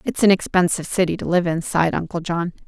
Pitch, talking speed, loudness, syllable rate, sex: 175 Hz, 225 wpm, -20 LUFS, 6.5 syllables/s, female